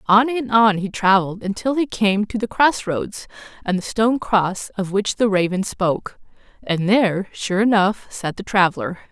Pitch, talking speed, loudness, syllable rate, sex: 205 Hz, 185 wpm, -19 LUFS, 4.8 syllables/s, female